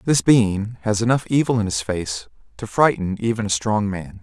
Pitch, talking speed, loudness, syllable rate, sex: 110 Hz, 200 wpm, -20 LUFS, 4.9 syllables/s, male